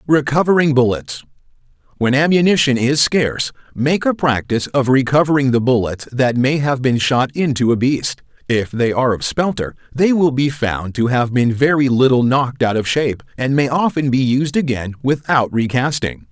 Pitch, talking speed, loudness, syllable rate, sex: 130 Hz, 170 wpm, -16 LUFS, 5.0 syllables/s, male